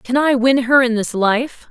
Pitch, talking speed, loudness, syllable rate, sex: 250 Hz, 245 wpm, -15 LUFS, 4.2 syllables/s, female